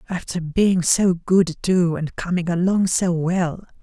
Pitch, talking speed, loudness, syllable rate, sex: 175 Hz, 155 wpm, -20 LUFS, 3.8 syllables/s, male